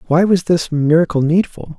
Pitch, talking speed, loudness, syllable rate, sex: 165 Hz, 170 wpm, -15 LUFS, 5.0 syllables/s, male